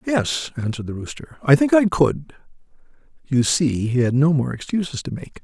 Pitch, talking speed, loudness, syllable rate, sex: 150 Hz, 190 wpm, -20 LUFS, 5.1 syllables/s, male